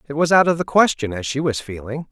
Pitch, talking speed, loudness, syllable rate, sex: 140 Hz, 285 wpm, -19 LUFS, 6.2 syllables/s, male